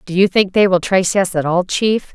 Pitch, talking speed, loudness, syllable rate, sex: 190 Hz, 280 wpm, -15 LUFS, 5.4 syllables/s, female